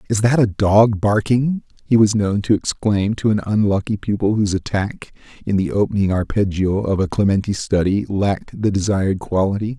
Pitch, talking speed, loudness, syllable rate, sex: 105 Hz, 170 wpm, -18 LUFS, 5.2 syllables/s, male